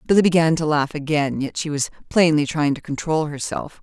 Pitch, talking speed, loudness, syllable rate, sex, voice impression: 155 Hz, 205 wpm, -20 LUFS, 5.5 syllables/s, female, very feminine, adult-like, slightly thin, tensed, powerful, slightly dark, very hard, very clear, very fluent, cool, very intellectual, refreshing, sincere, slightly calm, friendly, very reassuring, very unique, slightly elegant, wild, sweet, very lively, strict, intense, slightly sharp